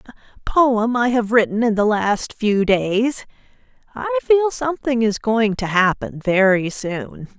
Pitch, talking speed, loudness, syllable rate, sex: 220 Hz, 155 wpm, -18 LUFS, 4.0 syllables/s, female